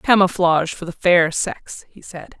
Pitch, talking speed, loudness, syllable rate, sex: 175 Hz, 175 wpm, -18 LUFS, 4.4 syllables/s, female